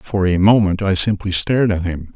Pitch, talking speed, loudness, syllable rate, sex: 95 Hz, 220 wpm, -16 LUFS, 5.2 syllables/s, male